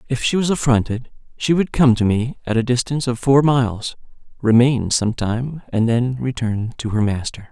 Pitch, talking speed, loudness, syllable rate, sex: 120 Hz, 190 wpm, -19 LUFS, 5.0 syllables/s, male